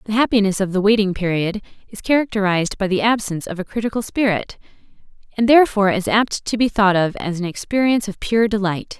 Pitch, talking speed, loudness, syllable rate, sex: 205 Hz, 195 wpm, -18 LUFS, 6.3 syllables/s, female